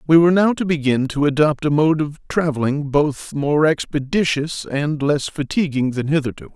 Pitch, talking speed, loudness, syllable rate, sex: 150 Hz, 175 wpm, -19 LUFS, 5.0 syllables/s, male